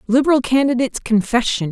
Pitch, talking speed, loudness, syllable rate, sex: 245 Hz, 105 wpm, -17 LUFS, 6.4 syllables/s, female